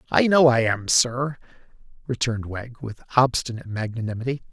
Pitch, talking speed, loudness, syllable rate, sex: 120 Hz, 135 wpm, -22 LUFS, 5.6 syllables/s, male